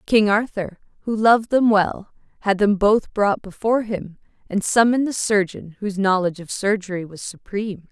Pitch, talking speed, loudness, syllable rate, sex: 205 Hz, 165 wpm, -20 LUFS, 5.3 syllables/s, female